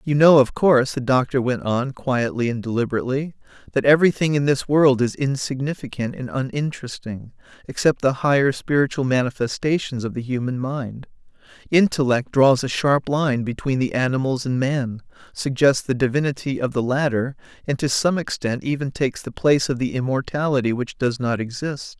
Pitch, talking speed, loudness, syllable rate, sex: 135 Hz, 165 wpm, -21 LUFS, 5.4 syllables/s, male